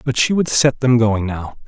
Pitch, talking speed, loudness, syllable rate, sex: 120 Hz, 250 wpm, -16 LUFS, 4.7 syllables/s, male